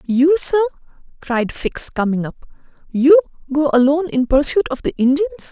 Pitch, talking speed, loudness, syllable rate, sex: 295 Hz, 150 wpm, -17 LUFS, 5.3 syllables/s, female